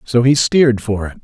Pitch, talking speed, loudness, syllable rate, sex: 120 Hz, 245 wpm, -14 LUFS, 5.5 syllables/s, male